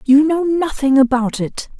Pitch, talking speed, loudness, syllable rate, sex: 280 Hz, 165 wpm, -16 LUFS, 4.3 syllables/s, female